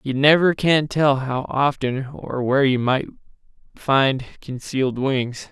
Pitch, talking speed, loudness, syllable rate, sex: 135 Hz, 140 wpm, -20 LUFS, 4.0 syllables/s, male